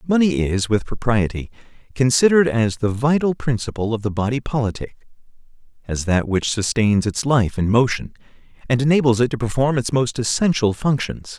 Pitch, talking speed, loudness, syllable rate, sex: 120 Hz, 160 wpm, -19 LUFS, 5.3 syllables/s, male